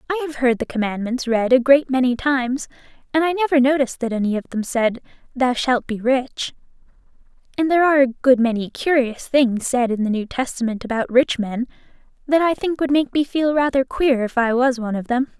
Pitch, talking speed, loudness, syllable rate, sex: 255 Hz, 210 wpm, -19 LUFS, 5.7 syllables/s, female